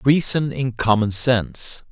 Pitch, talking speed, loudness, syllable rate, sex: 120 Hz, 125 wpm, -19 LUFS, 3.9 syllables/s, male